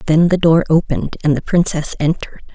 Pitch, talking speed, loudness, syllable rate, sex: 160 Hz, 190 wpm, -16 LUFS, 6.1 syllables/s, female